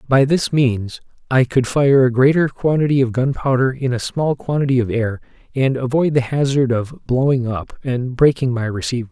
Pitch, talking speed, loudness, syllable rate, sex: 130 Hz, 185 wpm, -17 LUFS, 5.0 syllables/s, male